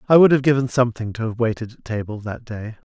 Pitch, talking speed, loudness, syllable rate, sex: 120 Hz, 250 wpm, -20 LUFS, 6.3 syllables/s, male